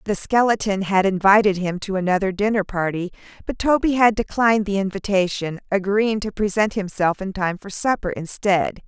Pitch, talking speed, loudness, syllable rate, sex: 200 Hz, 160 wpm, -20 LUFS, 5.2 syllables/s, female